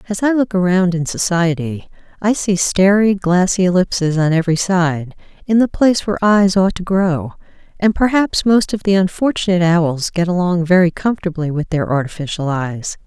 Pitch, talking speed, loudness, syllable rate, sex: 180 Hz, 165 wpm, -16 LUFS, 5.2 syllables/s, female